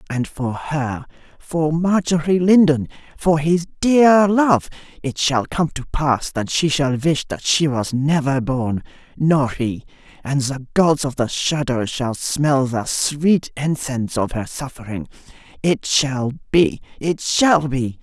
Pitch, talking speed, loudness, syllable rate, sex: 145 Hz, 135 wpm, -19 LUFS, 3.7 syllables/s, male